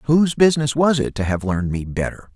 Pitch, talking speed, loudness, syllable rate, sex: 130 Hz, 230 wpm, -19 LUFS, 6.1 syllables/s, male